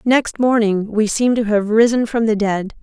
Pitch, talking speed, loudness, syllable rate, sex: 220 Hz, 215 wpm, -16 LUFS, 4.8 syllables/s, female